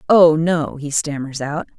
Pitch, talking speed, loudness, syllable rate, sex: 150 Hz, 170 wpm, -18 LUFS, 4.1 syllables/s, female